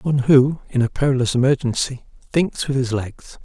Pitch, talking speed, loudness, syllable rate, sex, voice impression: 130 Hz, 175 wpm, -19 LUFS, 5.3 syllables/s, male, very masculine, very adult-like, slightly middle-aged, very thick, relaxed, weak, slightly dark, very soft, slightly muffled, slightly halting, slightly raspy, slightly cool, intellectual, very sincere, very calm, very mature, slightly friendly, very unique, slightly wild, sweet, slightly kind, modest